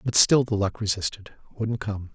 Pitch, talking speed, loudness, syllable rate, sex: 105 Hz, 195 wpm, -24 LUFS, 4.8 syllables/s, male